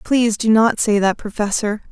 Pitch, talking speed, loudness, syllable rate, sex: 215 Hz, 190 wpm, -17 LUFS, 5.1 syllables/s, female